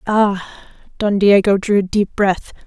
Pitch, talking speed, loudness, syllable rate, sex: 200 Hz, 155 wpm, -16 LUFS, 3.9 syllables/s, female